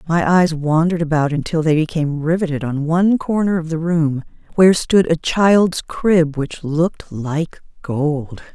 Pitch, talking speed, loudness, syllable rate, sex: 160 Hz, 160 wpm, -17 LUFS, 4.5 syllables/s, female